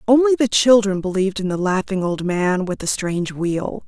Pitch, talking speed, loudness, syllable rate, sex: 200 Hz, 200 wpm, -19 LUFS, 5.1 syllables/s, female